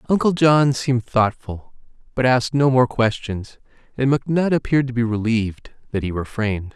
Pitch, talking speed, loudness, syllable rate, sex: 125 Hz, 160 wpm, -20 LUFS, 5.5 syllables/s, male